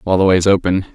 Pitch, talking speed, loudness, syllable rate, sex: 95 Hz, 255 wpm, -14 LUFS, 7.5 syllables/s, male